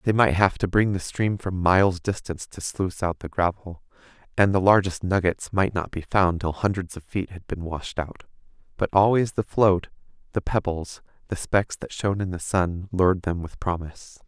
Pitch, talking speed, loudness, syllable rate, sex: 90 Hz, 200 wpm, -24 LUFS, 5.0 syllables/s, male